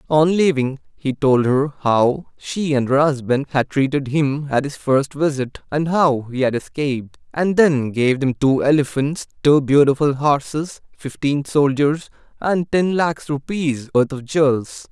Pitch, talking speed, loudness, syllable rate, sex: 145 Hz, 160 wpm, -19 LUFS, 4.1 syllables/s, male